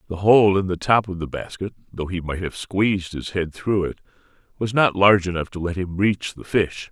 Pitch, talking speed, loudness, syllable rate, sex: 95 Hz, 235 wpm, -21 LUFS, 5.3 syllables/s, male